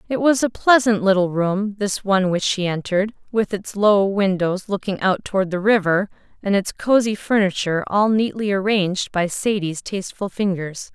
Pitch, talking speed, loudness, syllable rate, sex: 200 Hz, 170 wpm, -20 LUFS, 5.0 syllables/s, female